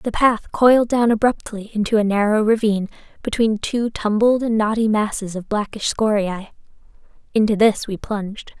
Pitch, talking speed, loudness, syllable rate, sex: 215 Hz, 155 wpm, -19 LUFS, 5.0 syllables/s, female